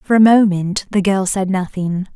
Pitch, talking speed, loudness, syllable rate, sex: 195 Hz, 195 wpm, -16 LUFS, 4.7 syllables/s, female